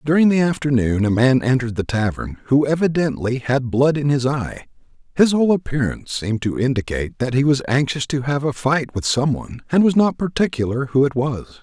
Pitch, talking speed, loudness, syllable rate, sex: 135 Hz, 200 wpm, -19 LUFS, 5.7 syllables/s, male